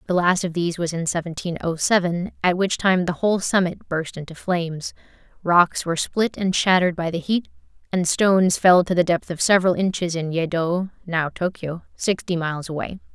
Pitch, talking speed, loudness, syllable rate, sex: 175 Hz, 190 wpm, -21 LUFS, 5.4 syllables/s, female